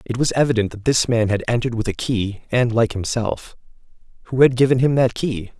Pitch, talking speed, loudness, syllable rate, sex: 120 Hz, 215 wpm, -19 LUFS, 5.7 syllables/s, male